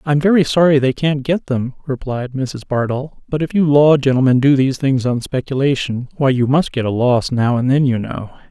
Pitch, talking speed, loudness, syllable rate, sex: 135 Hz, 220 wpm, -16 LUFS, 5.2 syllables/s, male